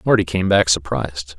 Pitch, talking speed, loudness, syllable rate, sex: 85 Hz, 175 wpm, -18 LUFS, 5.5 syllables/s, male